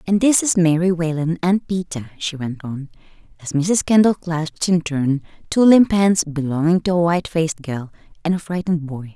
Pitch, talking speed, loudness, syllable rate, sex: 165 Hz, 190 wpm, -19 LUFS, 5.2 syllables/s, female